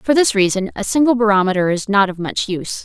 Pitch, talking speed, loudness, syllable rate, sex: 210 Hz, 230 wpm, -16 LUFS, 6.2 syllables/s, female